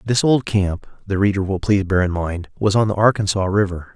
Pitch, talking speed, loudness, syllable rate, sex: 100 Hz, 225 wpm, -19 LUFS, 5.5 syllables/s, male